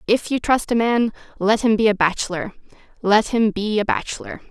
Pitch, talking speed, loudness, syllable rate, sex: 215 Hz, 185 wpm, -20 LUFS, 5.3 syllables/s, female